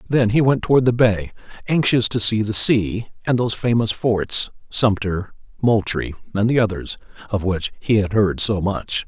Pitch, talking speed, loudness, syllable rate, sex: 110 Hz, 180 wpm, -19 LUFS, 4.7 syllables/s, male